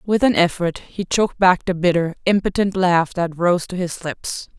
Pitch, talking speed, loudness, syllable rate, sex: 180 Hz, 195 wpm, -19 LUFS, 4.6 syllables/s, female